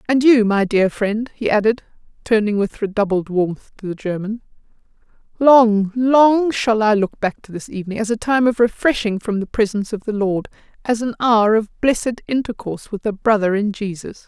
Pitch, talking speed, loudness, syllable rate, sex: 215 Hz, 190 wpm, -18 LUFS, 5.1 syllables/s, female